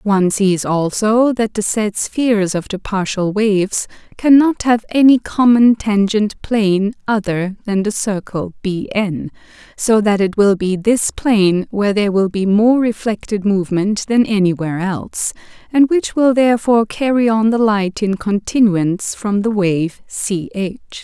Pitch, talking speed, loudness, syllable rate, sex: 210 Hz, 155 wpm, -16 LUFS, 4.4 syllables/s, female